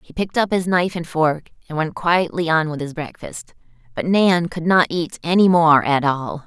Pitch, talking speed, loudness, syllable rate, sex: 165 Hz, 215 wpm, -18 LUFS, 5.0 syllables/s, female